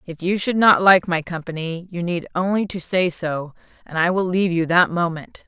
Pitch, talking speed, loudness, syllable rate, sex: 175 Hz, 220 wpm, -20 LUFS, 5.1 syllables/s, female